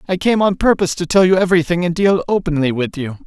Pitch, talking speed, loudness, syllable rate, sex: 175 Hz, 240 wpm, -15 LUFS, 6.5 syllables/s, male